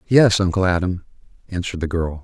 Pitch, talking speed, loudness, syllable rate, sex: 90 Hz, 160 wpm, -20 LUFS, 6.0 syllables/s, male